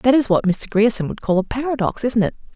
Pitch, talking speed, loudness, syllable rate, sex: 225 Hz, 260 wpm, -19 LUFS, 6.2 syllables/s, female